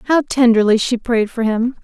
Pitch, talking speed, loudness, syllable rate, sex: 235 Hz, 195 wpm, -15 LUFS, 4.6 syllables/s, female